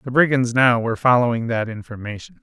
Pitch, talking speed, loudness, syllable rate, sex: 120 Hz, 175 wpm, -18 LUFS, 6.1 syllables/s, male